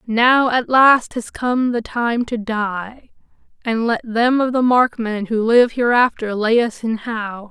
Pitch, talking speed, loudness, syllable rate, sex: 230 Hz, 175 wpm, -17 LUFS, 3.8 syllables/s, female